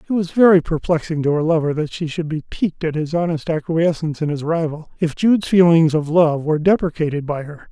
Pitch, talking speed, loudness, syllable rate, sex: 160 Hz, 220 wpm, -18 LUFS, 5.9 syllables/s, male